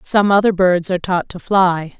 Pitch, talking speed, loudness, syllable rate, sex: 185 Hz, 210 wpm, -16 LUFS, 4.8 syllables/s, female